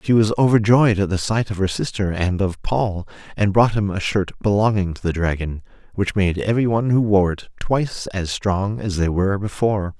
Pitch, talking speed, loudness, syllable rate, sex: 100 Hz, 210 wpm, -20 LUFS, 5.3 syllables/s, male